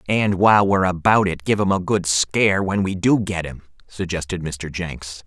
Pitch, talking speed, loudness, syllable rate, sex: 95 Hz, 205 wpm, -19 LUFS, 4.9 syllables/s, male